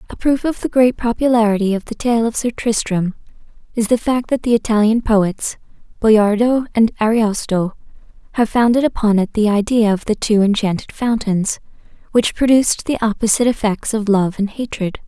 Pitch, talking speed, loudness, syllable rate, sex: 220 Hz, 165 wpm, -16 LUFS, 5.2 syllables/s, female